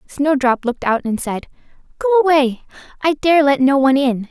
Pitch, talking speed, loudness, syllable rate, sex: 265 Hz, 165 wpm, -16 LUFS, 5.5 syllables/s, female